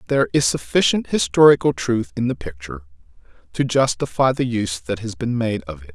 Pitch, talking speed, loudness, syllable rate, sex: 105 Hz, 180 wpm, -19 LUFS, 5.8 syllables/s, male